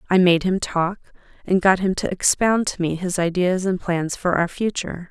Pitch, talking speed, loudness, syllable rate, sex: 180 Hz, 210 wpm, -20 LUFS, 4.9 syllables/s, female